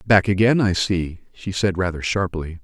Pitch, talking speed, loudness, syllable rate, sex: 95 Hz, 180 wpm, -20 LUFS, 4.6 syllables/s, male